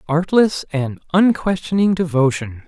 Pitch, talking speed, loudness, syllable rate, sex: 165 Hz, 90 wpm, -18 LUFS, 4.3 syllables/s, male